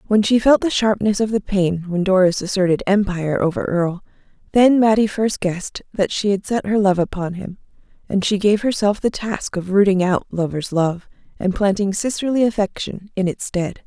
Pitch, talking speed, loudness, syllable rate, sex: 195 Hz, 190 wpm, -19 LUFS, 5.2 syllables/s, female